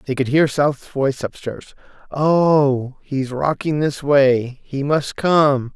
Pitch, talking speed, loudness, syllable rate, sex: 140 Hz, 155 wpm, -18 LUFS, 3.3 syllables/s, male